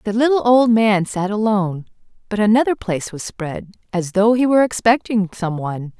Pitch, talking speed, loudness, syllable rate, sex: 210 Hz, 180 wpm, -18 LUFS, 5.4 syllables/s, female